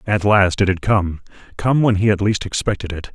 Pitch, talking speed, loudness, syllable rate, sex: 100 Hz, 210 wpm, -18 LUFS, 5.3 syllables/s, male